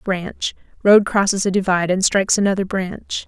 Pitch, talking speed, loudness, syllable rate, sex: 190 Hz, 145 wpm, -18 LUFS, 5.2 syllables/s, female